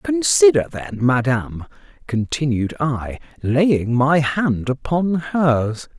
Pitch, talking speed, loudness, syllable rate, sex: 140 Hz, 100 wpm, -19 LUFS, 3.3 syllables/s, male